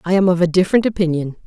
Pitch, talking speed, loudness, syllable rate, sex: 180 Hz, 245 wpm, -16 LUFS, 7.8 syllables/s, female